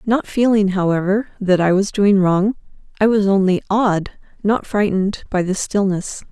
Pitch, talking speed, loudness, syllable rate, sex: 200 Hz, 160 wpm, -17 LUFS, 4.6 syllables/s, female